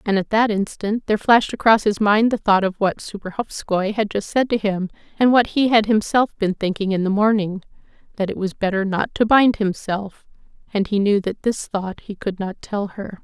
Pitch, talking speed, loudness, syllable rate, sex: 205 Hz, 210 wpm, -20 LUFS, 5.1 syllables/s, female